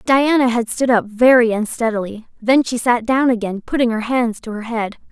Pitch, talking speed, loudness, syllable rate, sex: 235 Hz, 200 wpm, -17 LUFS, 5.0 syllables/s, female